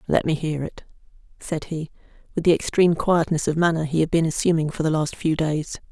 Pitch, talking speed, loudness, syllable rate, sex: 160 Hz, 215 wpm, -22 LUFS, 5.8 syllables/s, female